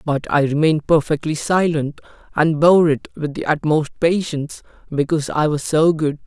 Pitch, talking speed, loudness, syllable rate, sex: 155 Hz, 165 wpm, -18 LUFS, 5.0 syllables/s, male